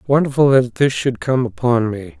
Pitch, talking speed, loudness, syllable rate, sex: 130 Hz, 190 wpm, -17 LUFS, 4.9 syllables/s, male